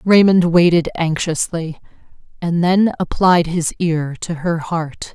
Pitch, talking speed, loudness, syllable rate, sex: 170 Hz, 130 wpm, -17 LUFS, 3.7 syllables/s, female